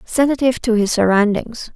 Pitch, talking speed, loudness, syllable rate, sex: 230 Hz, 135 wpm, -16 LUFS, 5.5 syllables/s, female